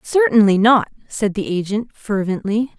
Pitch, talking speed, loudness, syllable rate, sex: 220 Hz, 130 wpm, -17 LUFS, 4.5 syllables/s, female